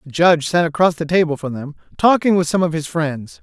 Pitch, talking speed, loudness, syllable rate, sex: 160 Hz, 245 wpm, -17 LUFS, 5.8 syllables/s, male